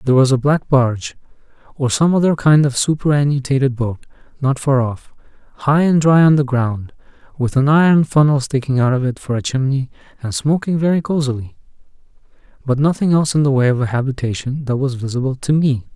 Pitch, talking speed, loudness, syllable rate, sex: 135 Hz, 190 wpm, -16 LUFS, 5.8 syllables/s, male